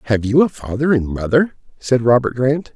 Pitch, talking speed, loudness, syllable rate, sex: 130 Hz, 195 wpm, -17 LUFS, 5.2 syllables/s, male